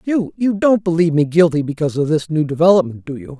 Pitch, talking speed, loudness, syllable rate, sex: 165 Hz, 210 wpm, -16 LUFS, 6.4 syllables/s, male